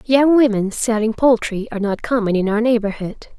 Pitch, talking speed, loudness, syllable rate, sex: 225 Hz, 175 wpm, -17 LUFS, 5.4 syllables/s, female